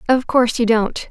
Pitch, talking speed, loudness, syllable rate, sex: 235 Hz, 215 wpm, -17 LUFS, 5.4 syllables/s, female